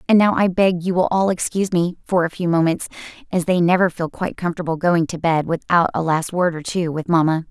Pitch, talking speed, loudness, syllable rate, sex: 175 Hz, 240 wpm, -19 LUFS, 5.9 syllables/s, female